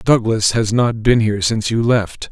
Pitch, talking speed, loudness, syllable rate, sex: 110 Hz, 205 wpm, -16 LUFS, 5.0 syllables/s, male